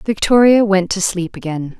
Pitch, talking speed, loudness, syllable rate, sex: 195 Hz, 165 wpm, -15 LUFS, 4.6 syllables/s, female